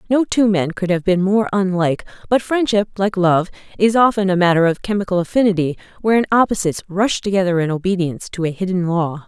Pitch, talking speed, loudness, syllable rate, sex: 190 Hz, 190 wpm, -17 LUFS, 6.1 syllables/s, female